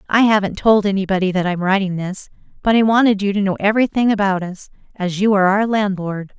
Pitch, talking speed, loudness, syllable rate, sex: 200 Hz, 215 wpm, -17 LUFS, 6.2 syllables/s, female